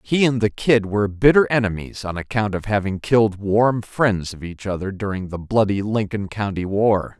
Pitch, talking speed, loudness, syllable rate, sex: 105 Hz, 190 wpm, -20 LUFS, 4.9 syllables/s, male